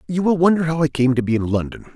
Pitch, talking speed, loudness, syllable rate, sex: 145 Hz, 305 wpm, -18 LUFS, 6.9 syllables/s, male